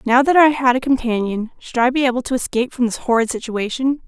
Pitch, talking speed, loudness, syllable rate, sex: 250 Hz, 235 wpm, -18 LUFS, 6.3 syllables/s, female